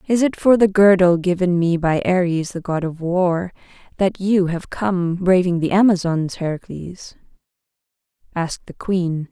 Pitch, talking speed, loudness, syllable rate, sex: 180 Hz, 155 wpm, -18 LUFS, 4.4 syllables/s, female